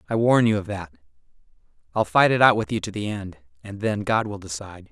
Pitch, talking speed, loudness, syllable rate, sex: 100 Hz, 230 wpm, -22 LUFS, 6.0 syllables/s, male